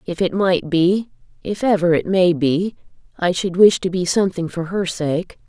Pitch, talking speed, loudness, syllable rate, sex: 180 Hz, 175 wpm, -18 LUFS, 4.7 syllables/s, female